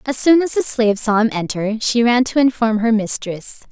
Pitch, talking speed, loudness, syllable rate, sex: 230 Hz, 225 wpm, -16 LUFS, 5.1 syllables/s, female